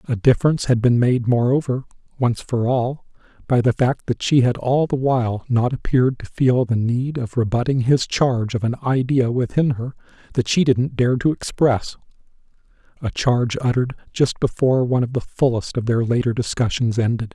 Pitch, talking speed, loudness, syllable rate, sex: 125 Hz, 180 wpm, -20 LUFS, 5.3 syllables/s, male